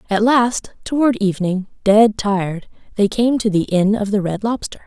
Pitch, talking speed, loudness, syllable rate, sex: 210 Hz, 185 wpm, -17 LUFS, 4.9 syllables/s, female